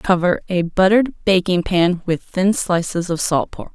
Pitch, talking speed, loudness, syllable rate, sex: 180 Hz, 175 wpm, -18 LUFS, 4.6 syllables/s, female